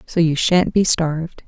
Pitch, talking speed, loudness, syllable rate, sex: 165 Hz, 205 wpm, -17 LUFS, 4.4 syllables/s, female